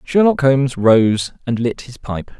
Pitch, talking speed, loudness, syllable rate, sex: 130 Hz, 175 wpm, -16 LUFS, 4.2 syllables/s, male